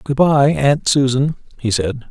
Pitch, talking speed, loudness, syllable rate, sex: 135 Hz, 170 wpm, -16 LUFS, 4.0 syllables/s, male